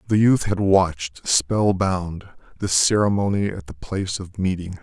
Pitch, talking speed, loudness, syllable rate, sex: 95 Hz, 150 wpm, -21 LUFS, 4.4 syllables/s, male